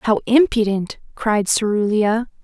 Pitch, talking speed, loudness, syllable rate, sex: 220 Hz, 100 wpm, -18 LUFS, 4.1 syllables/s, female